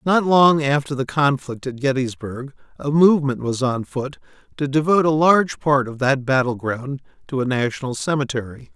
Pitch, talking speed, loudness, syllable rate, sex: 140 Hz, 170 wpm, -19 LUFS, 5.1 syllables/s, male